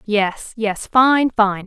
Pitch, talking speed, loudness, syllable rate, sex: 220 Hz, 110 wpm, -17 LUFS, 2.6 syllables/s, female